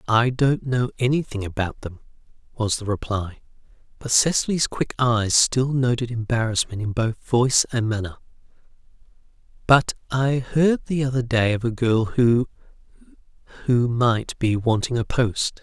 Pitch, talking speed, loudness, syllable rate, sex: 120 Hz, 140 wpm, -21 LUFS, 4.5 syllables/s, male